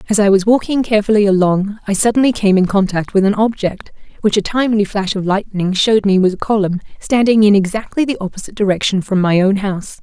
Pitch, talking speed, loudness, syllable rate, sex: 205 Hz, 210 wpm, -15 LUFS, 6.3 syllables/s, female